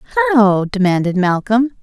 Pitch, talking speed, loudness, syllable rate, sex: 220 Hz, 100 wpm, -15 LUFS, 5.7 syllables/s, female